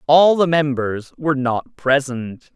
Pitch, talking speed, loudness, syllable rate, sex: 140 Hz, 140 wpm, -18 LUFS, 3.8 syllables/s, male